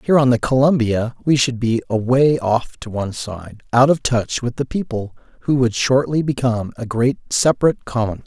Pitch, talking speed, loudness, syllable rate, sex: 125 Hz, 190 wpm, -18 LUFS, 5.3 syllables/s, male